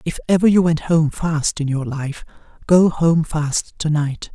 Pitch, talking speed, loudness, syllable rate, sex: 160 Hz, 195 wpm, -18 LUFS, 4.0 syllables/s, male